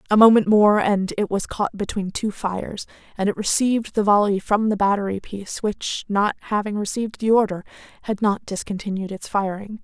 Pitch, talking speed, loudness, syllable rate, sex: 205 Hz, 185 wpm, -21 LUFS, 5.4 syllables/s, female